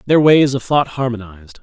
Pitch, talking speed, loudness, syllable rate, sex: 125 Hz, 185 wpm, -15 LUFS, 5.5 syllables/s, male